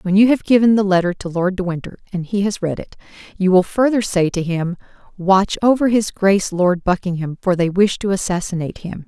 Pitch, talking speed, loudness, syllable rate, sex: 190 Hz, 220 wpm, -17 LUFS, 5.7 syllables/s, female